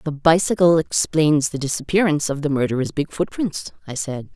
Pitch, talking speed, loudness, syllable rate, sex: 155 Hz, 180 wpm, -20 LUFS, 5.5 syllables/s, female